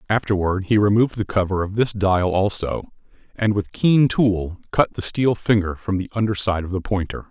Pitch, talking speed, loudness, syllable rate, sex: 100 Hz, 195 wpm, -20 LUFS, 5.1 syllables/s, male